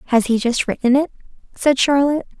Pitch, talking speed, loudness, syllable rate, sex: 260 Hz, 175 wpm, -17 LUFS, 6.2 syllables/s, female